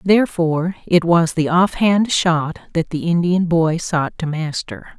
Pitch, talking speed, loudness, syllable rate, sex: 170 Hz, 170 wpm, -18 LUFS, 4.2 syllables/s, female